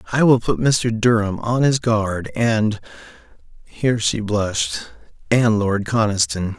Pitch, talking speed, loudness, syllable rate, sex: 110 Hz, 120 wpm, -19 LUFS, 4.2 syllables/s, male